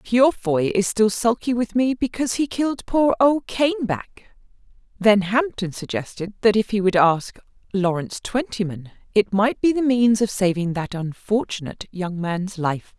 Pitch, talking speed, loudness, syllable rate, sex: 215 Hz, 155 wpm, -21 LUFS, 4.7 syllables/s, female